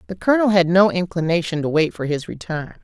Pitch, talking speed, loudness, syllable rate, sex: 175 Hz, 210 wpm, -19 LUFS, 6.1 syllables/s, female